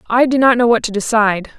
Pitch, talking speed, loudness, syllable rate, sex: 230 Hz, 265 wpm, -14 LUFS, 6.5 syllables/s, female